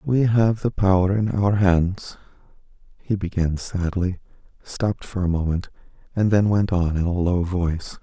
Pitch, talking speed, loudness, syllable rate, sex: 95 Hz, 165 wpm, -22 LUFS, 4.5 syllables/s, male